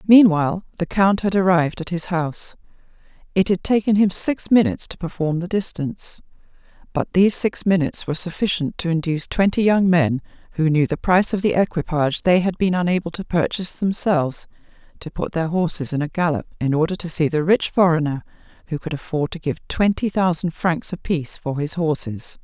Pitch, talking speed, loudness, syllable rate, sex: 170 Hz, 185 wpm, -20 LUFS, 5.7 syllables/s, female